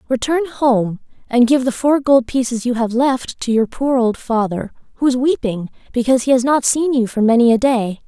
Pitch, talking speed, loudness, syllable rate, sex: 245 Hz, 215 wpm, -16 LUFS, 5.1 syllables/s, female